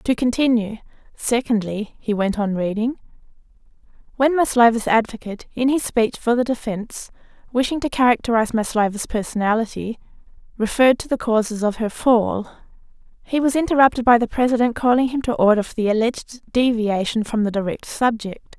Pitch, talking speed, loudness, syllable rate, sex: 230 Hz, 150 wpm, -20 LUFS, 5.6 syllables/s, female